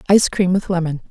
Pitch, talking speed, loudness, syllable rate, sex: 180 Hz, 215 wpm, -17 LUFS, 7.1 syllables/s, female